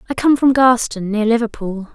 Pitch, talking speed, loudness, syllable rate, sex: 230 Hz, 185 wpm, -16 LUFS, 5.1 syllables/s, female